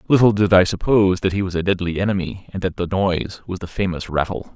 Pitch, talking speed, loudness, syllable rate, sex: 95 Hz, 235 wpm, -20 LUFS, 6.4 syllables/s, male